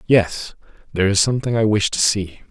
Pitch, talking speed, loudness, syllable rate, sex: 105 Hz, 190 wpm, -18 LUFS, 5.6 syllables/s, male